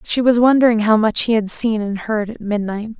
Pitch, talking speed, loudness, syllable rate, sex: 220 Hz, 240 wpm, -17 LUFS, 5.3 syllables/s, female